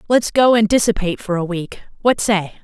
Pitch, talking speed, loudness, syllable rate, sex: 205 Hz, 180 wpm, -17 LUFS, 5.6 syllables/s, female